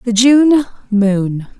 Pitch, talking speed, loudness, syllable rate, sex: 230 Hz, 115 wpm, -13 LUFS, 2.6 syllables/s, female